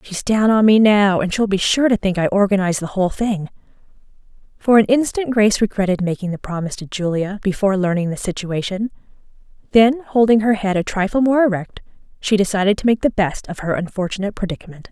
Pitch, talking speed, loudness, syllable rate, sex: 200 Hz, 195 wpm, -18 LUFS, 6.2 syllables/s, female